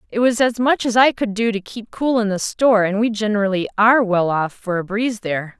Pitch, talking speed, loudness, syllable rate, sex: 215 Hz, 255 wpm, -18 LUFS, 5.9 syllables/s, female